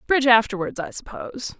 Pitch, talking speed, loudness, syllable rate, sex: 240 Hz, 150 wpm, -21 LUFS, 6.3 syllables/s, female